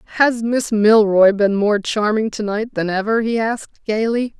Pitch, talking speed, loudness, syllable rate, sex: 215 Hz, 180 wpm, -17 LUFS, 4.5 syllables/s, female